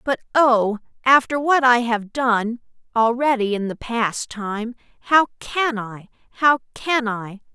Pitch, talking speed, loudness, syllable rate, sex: 240 Hz, 145 wpm, -20 LUFS, 3.7 syllables/s, female